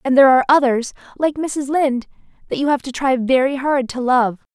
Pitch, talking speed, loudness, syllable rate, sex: 265 Hz, 210 wpm, -17 LUFS, 5.8 syllables/s, female